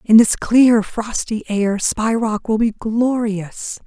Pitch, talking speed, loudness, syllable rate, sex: 220 Hz, 155 wpm, -17 LUFS, 3.3 syllables/s, female